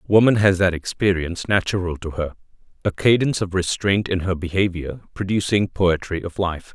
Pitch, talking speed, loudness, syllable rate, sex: 95 Hz, 150 wpm, -21 LUFS, 5.3 syllables/s, male